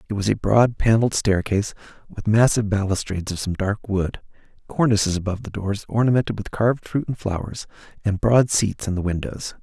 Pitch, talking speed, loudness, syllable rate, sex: 105 Hz, 180 wpm, -22 LUFS, 5.9 syllables/s, male